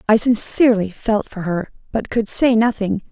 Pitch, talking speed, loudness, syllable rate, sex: 215 Hz, 175 wpm, -18 LUFS, 4.8 syllables/s, female